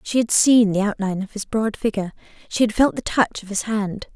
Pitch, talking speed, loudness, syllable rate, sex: 210 Hz, 245 wpm, -20 LUFS, 5.7 syllables/s, female